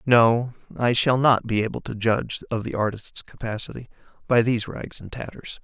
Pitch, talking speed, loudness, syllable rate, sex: 115 Hz, 180 wpm, -23 LUFS, 5.2 syllables/s, male